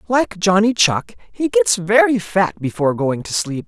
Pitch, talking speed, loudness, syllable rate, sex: 185 Hz, 180 wpm, -17 LUFS, 4.4 syllables/s, male